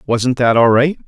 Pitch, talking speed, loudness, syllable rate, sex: 125 Hz, 225 wpm, -13 LUFS, 4.7 syllables/s, male